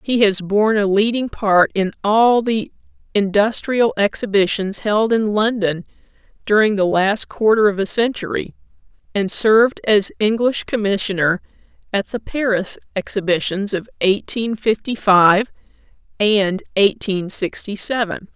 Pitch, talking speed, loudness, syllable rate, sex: 210 Hz, 125 wpm, -17 LUFS, 4.3 syllables/s, female